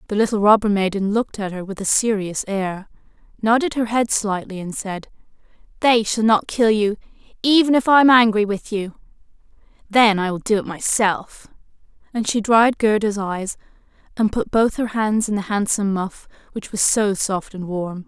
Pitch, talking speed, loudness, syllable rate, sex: 210 Hz, 185 wpm, -19 LUFS, 4.9 syllables/s, female